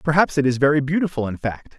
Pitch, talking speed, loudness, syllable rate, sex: 145 Hz, 235 wpm, -20 LUFS, 6.6 syllables/s, male